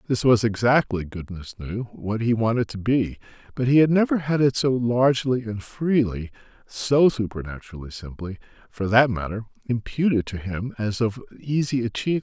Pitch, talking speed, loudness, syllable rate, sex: 115 Hz, 150 wpm, -23 LUFS, 5.1 syllables/s, male